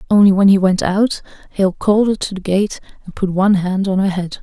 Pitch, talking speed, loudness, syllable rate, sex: 195 Hz, 245 wpm, -15 LUFS, 5.7 syllables/s, female